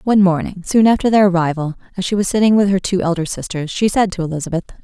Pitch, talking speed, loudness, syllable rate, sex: 190 Hz, 235 wpm, -16 LUFS, 6.9 syllables/s, female